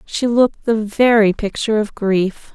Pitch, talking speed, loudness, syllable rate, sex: 215 Hz, 165 wpm, -16 LUFS, 4.5 syllables/s, female